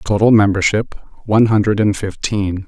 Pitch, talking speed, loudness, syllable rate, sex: 105 Hz, 135 wpm, -15 LUFS, 5.4 syllables/s, male